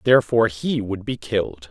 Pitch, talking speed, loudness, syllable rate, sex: 105 Hz, 175 wpm, -21 LUFS, 5.7 syllables/s, male